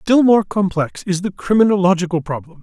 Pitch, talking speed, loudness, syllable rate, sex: 190 Hz, 160 wpm, -16 LUFS, 5.5 syllables/s, male